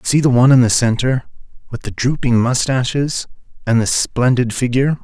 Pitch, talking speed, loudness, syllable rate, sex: 125 Hz, 165 wpm, -15 LUFS, 5.3 syllables/s, male